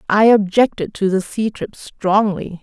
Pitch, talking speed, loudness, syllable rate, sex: 205 Hz, 160 wpm, -17 LUFS, 4.1 syllables/s, female